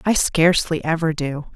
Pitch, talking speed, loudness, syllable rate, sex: 160 Hz, 155 wpm, -19 LUFS, 5.1 syllables/s, female